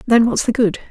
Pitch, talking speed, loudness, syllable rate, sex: 225 Hz, 265 wpm, -16 LUFS, 5.9 syllables/s, female